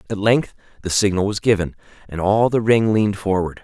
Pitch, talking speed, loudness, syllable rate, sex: 100 Hz, 200 wpm, -19 LUFS, 5.7 syllables/s, male